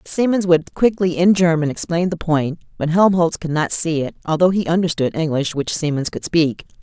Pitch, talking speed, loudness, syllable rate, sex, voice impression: 165 Hz, 195 wpm, -18 LUFS, 5.1 syllables/s, female, very feminine, very adult-like, very middle-aged, slightly thin, tensed, powerful, slightly bright, slightly hard, very clear, fluent, cool, very intellectual, slightly refreshing, very sincere, calm, friendly, reassuring, slightly unique, elegant, slightly wild, lively, kind, slightly intense